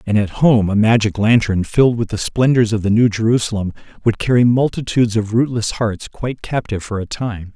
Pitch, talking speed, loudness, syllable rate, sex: 110 Hz, 200 wpm, -17 LUFS, 5.6 syllables/s, male